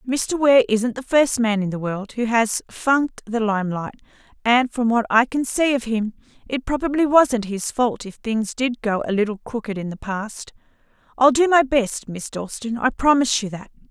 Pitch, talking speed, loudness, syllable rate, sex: 235 Hz, 205 wpm, -20 LUFS, 4.8 syllables/s, female